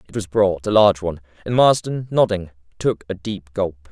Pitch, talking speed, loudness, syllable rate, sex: 95 Hz, 200 wpm, -19 LUFS, 5.3 syllables/s, male